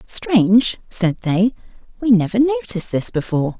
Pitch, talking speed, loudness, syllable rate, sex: 215 Hz, 135 wpm, -18 LUFS, 4.8 syllables/s, female